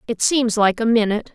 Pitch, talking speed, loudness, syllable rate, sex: 225 Hz, 225 wpm, -18 LUFS, 5.9 syllables/s, female